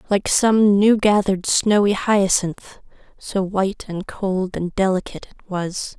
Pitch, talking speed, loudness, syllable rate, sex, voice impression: 195 Hz, 140 wpm, -19 LUFS, 4.3 syllables/s, female, feminine, slightly adult-like, slightly dark, slightly cute, calm, slightly unique, slightly kind